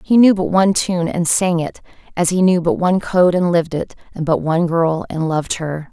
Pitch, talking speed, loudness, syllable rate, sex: 175 Hz, 245 wpm, -16 LUFS, 5.5 syllables/s, female